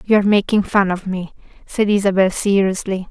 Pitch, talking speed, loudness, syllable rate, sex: 195 Hz, 155 wpm, -17 LUFS, 5.2 syllables/s, female